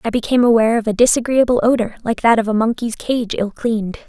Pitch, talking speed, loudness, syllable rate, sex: 230 Hz, 220 wpm, -16 LUFS, 6.6 syllables/s, female